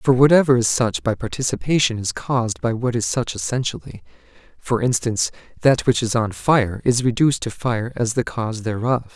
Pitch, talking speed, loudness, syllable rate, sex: 120 Hz, 185 wpm, -20 LUFS, 5.4 syllables/s, male